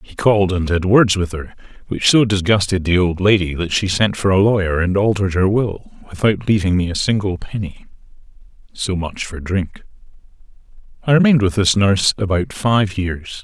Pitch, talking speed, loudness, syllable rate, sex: 95 Hz, 185 wpm, -17 LUFS, 5.2 syllables/s, male